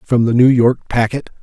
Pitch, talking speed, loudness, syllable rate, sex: 120 Hz, 210 wpm, -14 LUFS, 4.9 syllables/s, male